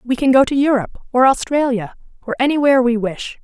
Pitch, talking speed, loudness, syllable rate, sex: 255 Hz, 190 wpm, -16 LUFS, 6.4 syllables/s, female